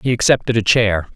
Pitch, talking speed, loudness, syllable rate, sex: 110 Hz, 205 wpm, -15 LUFS, 5.6 syllables/s, male